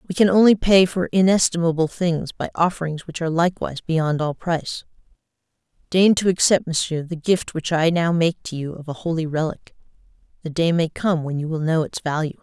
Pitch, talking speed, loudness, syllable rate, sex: 165 Hz, 200 wpm, -20 LUFS, 5.6 syllables/s, female